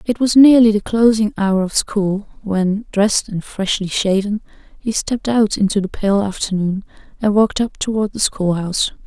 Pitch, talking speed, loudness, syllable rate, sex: 205 Hz, 170 wpm, -17 LUFS, 4.9 syllables/s, female